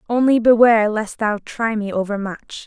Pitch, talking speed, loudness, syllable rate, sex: 220 Hz, 160 wpm, -18 LUFS, 4.9 syllables/s, female